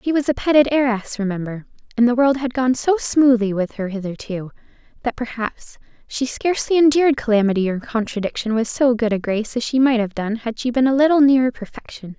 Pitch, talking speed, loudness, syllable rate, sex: 240 Hz, 200 wpm, -19 LUFS, 5.8 syllables/s, female